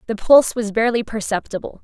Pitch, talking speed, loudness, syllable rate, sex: 220 Hz, 165 wpm, -17 LUFS, 6.7 syllables/s, female